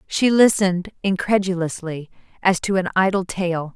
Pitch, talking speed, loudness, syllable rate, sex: 185 Hz, 130 wpm, -20 LUFS, 4.8 syllables/s, female